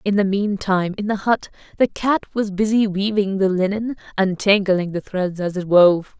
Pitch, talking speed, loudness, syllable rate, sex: 195 Hz, 195 wpm, -19 LUFS, 4.7 syllables/s, female